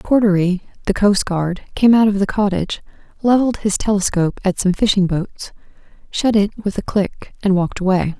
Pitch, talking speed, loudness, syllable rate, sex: 200 Hz, 170 wpm, -17 LUFS, 5.5 syllables/s, female